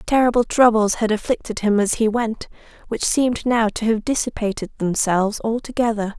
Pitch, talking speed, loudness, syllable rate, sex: 220 Hz, 155 wpm, -19 LUFS, 5.4 syllables/s, female